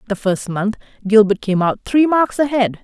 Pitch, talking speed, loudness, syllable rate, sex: 220 Hz, 190 wpm, -16 LUFS, 4.8 syllables/s, female